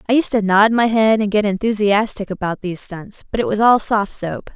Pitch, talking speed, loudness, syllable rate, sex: 205 Hz, 235 wpm, -17 LUFS, 5.4 syllables/s, female